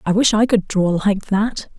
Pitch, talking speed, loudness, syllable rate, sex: 205 Hz, 235 wpm, -17 LUFS, 4.5 syllables/s, female